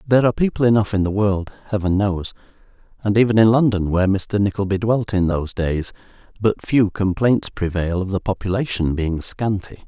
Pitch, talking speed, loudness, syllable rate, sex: 100 Hz, 175 wpm, -19 LUFS, 4.6 syllables/s, male